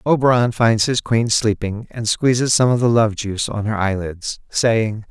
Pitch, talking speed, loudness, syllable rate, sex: 110 Hz, 190 wpm, -18 LUFS, 4.5 syllables/s, male